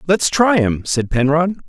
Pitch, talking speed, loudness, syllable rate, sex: 160 Hz, 180 wpm, -16 LUFS, 4.2 syllables/s, male